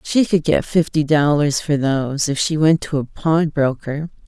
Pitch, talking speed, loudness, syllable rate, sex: 150 Hz, 185 wpm, -18 LUFS, 4.5 syllables/s, female